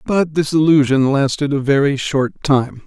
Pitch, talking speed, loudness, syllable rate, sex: 140 Hz, 165 wpm, -16 LUFS, 4.4 syllables/s, male